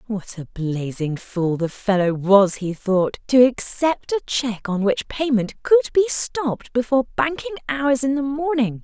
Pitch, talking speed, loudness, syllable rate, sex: 240 Hz, 170 wpm, -20 LUFS, 4.6 syllables/s, female